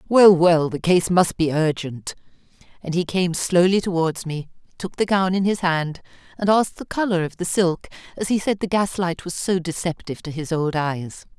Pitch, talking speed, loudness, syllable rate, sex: 175 Hz, 205 wpm, -21 LUFS, 4.9 syllables/s, female